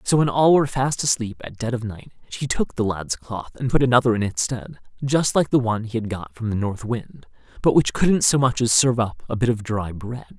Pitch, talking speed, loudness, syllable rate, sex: 115 Hz, 260 wpm, -21 LUFS, 5.4 syllables/s, male